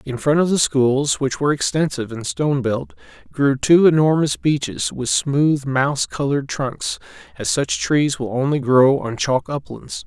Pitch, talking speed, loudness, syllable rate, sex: 140 Hz, 175 wpm, -19 LUFS, 4.6 syllables/s, male